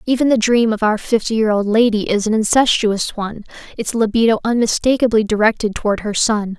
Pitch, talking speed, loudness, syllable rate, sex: 220 Hz, 180 wpm, -16 LUFS, 5.7 syllables/s, female